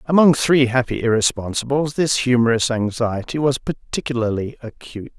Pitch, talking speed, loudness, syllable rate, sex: 125 Hz, 115 wpm, -19 LUFS, 5.2 syllables/s, male